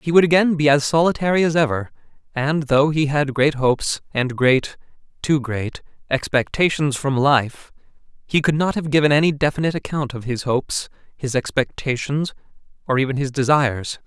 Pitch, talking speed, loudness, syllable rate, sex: 140 Hz, 155 wpm, -19 LUFS, 5.3 syllables/s, male